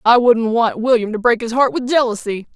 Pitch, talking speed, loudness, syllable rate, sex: 230 Hz, 235 wpm, -16 LUFS, 5.4 syllables/s, female